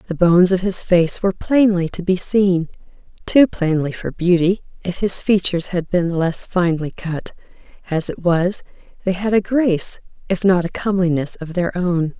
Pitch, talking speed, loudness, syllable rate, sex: 180 Hz, 170 wpm, -18 LUFS, 5.0 syllables/s, female